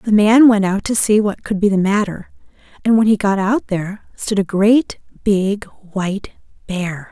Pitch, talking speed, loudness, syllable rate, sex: 200 Hz, 195 wpm, -16 LUFS, 4.4 syllables/s, female